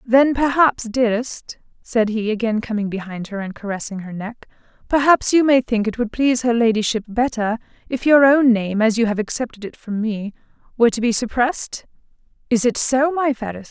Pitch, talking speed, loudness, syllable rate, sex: 235 Hz, 180 wpm, -19 LUFS, 5.4 syllables/s, female